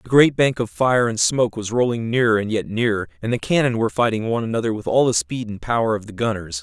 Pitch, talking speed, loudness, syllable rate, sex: 115 Hz, 265 wpm, -20 LUFS, 6.3 syllables/s, male